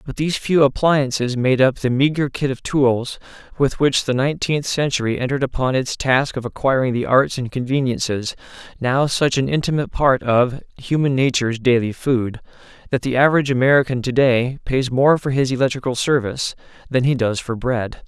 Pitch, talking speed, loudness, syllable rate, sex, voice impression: 130 Hz, 175 wpm, -19 LUFS, 5.4 syllables/s, male, masculine, adult-like, fluent, slightly cool, refreshing, sincere